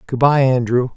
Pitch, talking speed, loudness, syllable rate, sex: 130 Hz, 190 wpm, -16 LUFS, 4.9 syllables/s, male